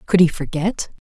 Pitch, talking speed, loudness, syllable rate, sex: 175 Hz, 175 wpm, -19 LUFS, 5.1 syllables/s, female